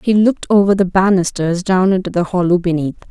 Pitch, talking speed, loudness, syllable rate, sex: 185 Hz, 195 wpm, -15 LUFS, 6.0 syllables/s, female